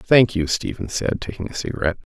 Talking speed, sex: 195 wpm, male